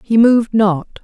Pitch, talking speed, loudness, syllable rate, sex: 215 Hz, 175 wpm, -13 LUFS, 4.9 syllables/s, female